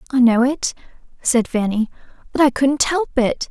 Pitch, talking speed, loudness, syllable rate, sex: 255 Hz, 170 wpm, -18 LUFS, 4.6 syllables/s, female